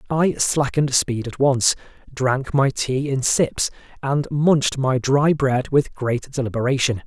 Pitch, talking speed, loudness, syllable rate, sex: 135 Hz, 155 wpm, -20 LUFS, 4.1 syllables/s, male